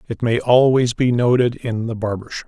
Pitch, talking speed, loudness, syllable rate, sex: 120 Hz, 220 wpm, -18 LUFS, 5.0 syllables/s, male